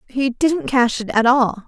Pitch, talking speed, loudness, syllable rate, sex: 245 Hz, 215 wpm, -17 LUFS, 4.0 syllables/s, female